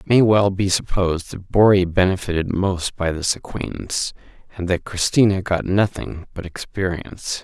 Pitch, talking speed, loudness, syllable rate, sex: 95 Hz, 155 wpm, -20 LUFS, 5.0 syllables/s, male